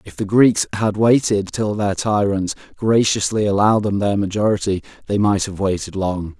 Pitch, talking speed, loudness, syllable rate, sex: 100 Hz, 170 wpm, -18 LUFS, 4.9 syllables/s, male